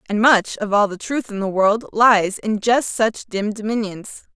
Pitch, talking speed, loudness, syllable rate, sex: 215 Hz, 205 wpm, -19 LUFS, 4.2 syllables/s, female